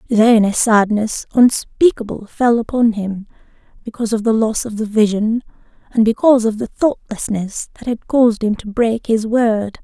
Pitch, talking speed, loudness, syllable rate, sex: 225 Hz, 165 wpm, -16 LUFS, 4.8 syllables/s, female